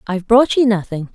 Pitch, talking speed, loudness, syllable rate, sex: 215 Hz, 210 wpm, -15 LUFS, 6.1 syllables/s, female